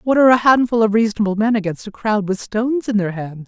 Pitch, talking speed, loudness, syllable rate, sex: 215 Hz, 260 wpm, -17 LUFS, 6.4 syllables/s, female